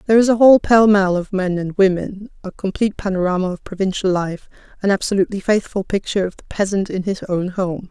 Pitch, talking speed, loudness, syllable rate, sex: 195 Hz, 205 wpm, -18 LUFS, 6.2 syllables/s, female